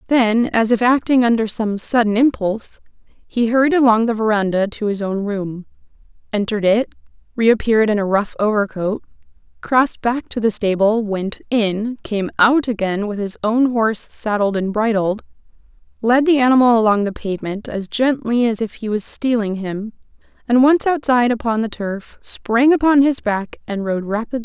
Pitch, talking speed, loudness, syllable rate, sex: 225 Hz, 170 wpm, -18 LUFS, 5.1 syllables/s, female